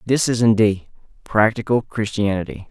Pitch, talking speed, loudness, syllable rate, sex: 110 Hz, 110 wpm, -19 LUFS, 4.9 syllables/s, male